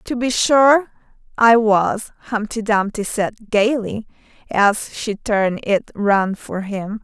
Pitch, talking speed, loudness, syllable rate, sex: 215 Hz, 135 wpm, -18 LUFS, 3.5 syllables/s, female